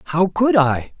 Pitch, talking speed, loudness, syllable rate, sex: 175 Hz, 180 wpm, -17 LUFS, 4.3 syllables/s, male